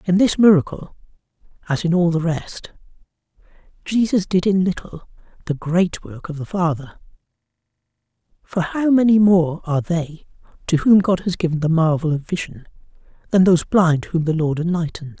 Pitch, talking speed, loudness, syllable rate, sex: 170 Hz, 160 wpm, -18 LUFS, 5.2 syllables/s, male